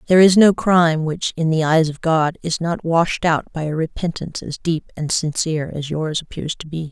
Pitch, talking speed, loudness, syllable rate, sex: 160 Hz, 225 wpm, -19 LUFS, 5.2 syllables/s, female